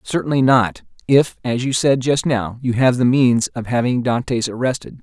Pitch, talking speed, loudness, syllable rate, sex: 125 Hz, 190 wpm, -17 LUFS, 4.8 syllables/s, male